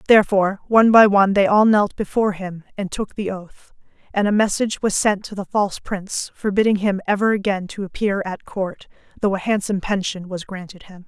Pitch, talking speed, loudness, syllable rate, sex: 200 Hz, 200 wpm, -19 LUFS, 5.8 syllables/s, female